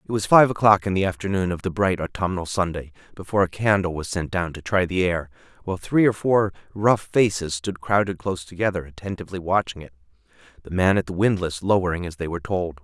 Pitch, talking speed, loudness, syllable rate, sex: 95 Hz, 210 wpm, -22 LUFS, 6.1 syllables/s, male